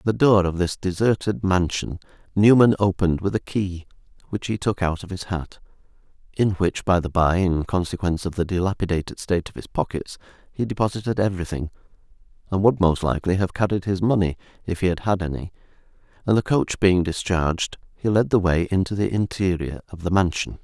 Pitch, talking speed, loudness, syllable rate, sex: 95 Hz, 175 wpm, -22 LUFS, 5.8 syllables/s, male